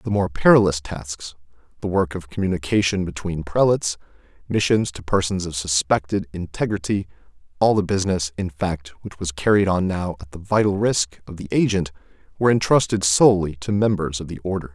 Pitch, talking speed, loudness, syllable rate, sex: 90 Hz, 160 wpm, -21 LUFS, 5.6 syllables/s, male